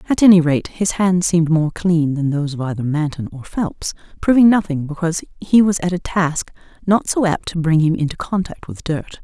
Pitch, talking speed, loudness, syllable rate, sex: 170 Hz, 215 wpm, -17 LUFS, 5.4 syllables/s, female